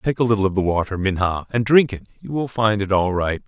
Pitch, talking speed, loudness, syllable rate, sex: 105 Hz, 275 wpm, -20 LUFS, 6.0 syllables/s, male